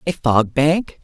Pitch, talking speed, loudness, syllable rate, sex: 150 Hz, 175 wpm, -17 LUFS, 3.3 syllables/s, female